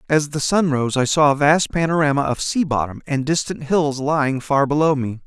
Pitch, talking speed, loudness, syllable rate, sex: 145 Hz, 215 wpm, -19 LUFS, 5.2 syllables/s, male